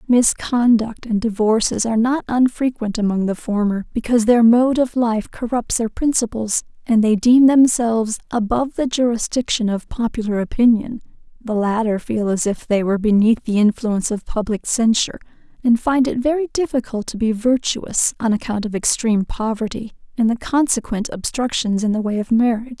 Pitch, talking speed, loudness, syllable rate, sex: 230 Hz, 165 wpm, -18 LUFS, 5.2 syllables/s, female